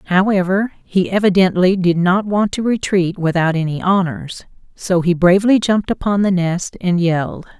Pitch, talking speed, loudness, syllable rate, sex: 185 Hz, 160 wpm, -16 LUFS, 4.9 syllables/s, female